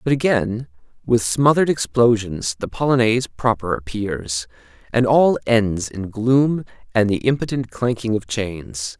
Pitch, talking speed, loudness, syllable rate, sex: 110 Hz, 135 wpm, -19 LUFS, 4.3 syllables/s, male